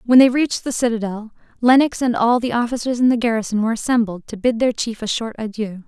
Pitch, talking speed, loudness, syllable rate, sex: 230 Hz, 225 wpm, -19 LUFS, 6.3 syllables/s, female